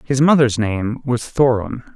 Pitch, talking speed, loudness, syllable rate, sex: 125 Hz, 155 wpm, -17 LUFS, 3.9 syllables/s, male